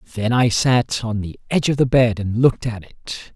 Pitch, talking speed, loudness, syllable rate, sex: 115 Hz, 230 wpm, -19 LUFS, 5.2 syllables/s, male